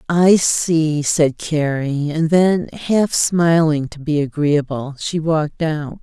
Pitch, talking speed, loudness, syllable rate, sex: 155 Hz, 140 wpm, -17 LUFS, 3.3 syllables/s, female